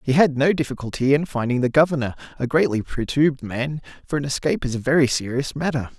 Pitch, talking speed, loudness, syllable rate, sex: 135 Hz, 200 wpm, -21 LUFS, 6.3 syllables/s, male